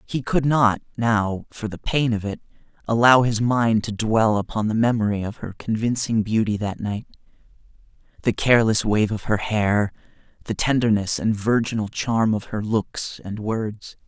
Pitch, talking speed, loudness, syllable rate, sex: 110 Hz, 160 wpm, -22 LUFS, 4.6 syllables/s, male